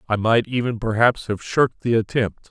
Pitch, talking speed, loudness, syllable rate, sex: 110 Hz, 190 wpm, -20 LUFS, 5.2 syllables/s, male